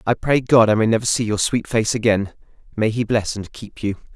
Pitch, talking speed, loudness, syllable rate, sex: 110 Hz, 245 wpm, -19 LUFS, 5.4 syllables/s, male